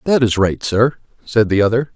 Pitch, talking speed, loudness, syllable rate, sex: 115 Hz, 215 wpm, -16 LUFS, 5.2 syllables/s, male